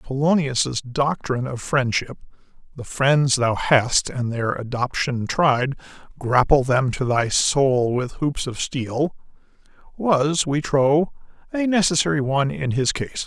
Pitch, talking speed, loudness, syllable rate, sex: 135 Hz, 125 wpm, -21 LUFS, 3.9 syllables/s, male